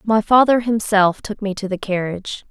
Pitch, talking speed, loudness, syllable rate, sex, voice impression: 205 Hz, 190 wpm, -18 LUFS, 5.0 syllables/s, female, feminine, slightly adult-like, slightly clear, slightly cute, friendly, slightly sweet, kind